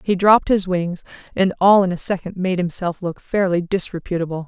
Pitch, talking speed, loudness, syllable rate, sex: 185 Hz, 190 wpm, -19 LUFS, 5.5 syllables/s, female